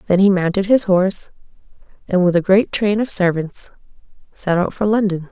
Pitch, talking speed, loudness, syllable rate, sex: 190 Hz, 180 wpm, -17 LUFS, 5.3 syllables/s, female